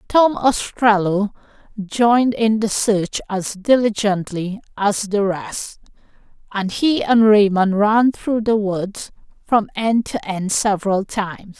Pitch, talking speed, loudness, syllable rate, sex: 210 Hz, 130 wpm, -18 LUFS, 3.6 syllables/s, female